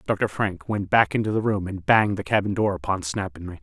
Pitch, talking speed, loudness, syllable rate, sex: 100 Hz, 265 wpm, -23 LUFS, 5.7 syllables/s, male